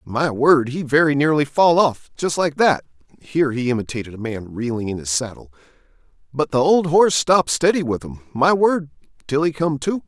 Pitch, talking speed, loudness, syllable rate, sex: 140 Hz, 190 wpm, -19 LUFS, 3.6 syllables/s, male